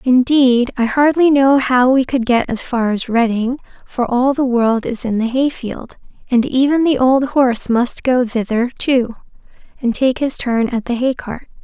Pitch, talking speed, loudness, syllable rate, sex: 250 Hz, 195 wpm, -15 LUFS, 4.3 syllables/s, female